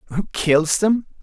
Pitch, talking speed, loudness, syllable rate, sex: 185 Hz, 145 wpm, -19 LUFS, 4.2 syllables/s, male